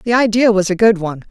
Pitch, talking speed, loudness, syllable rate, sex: 205 Hz, 275 wpm, -14 LUFS, 6.8 syllables/s, female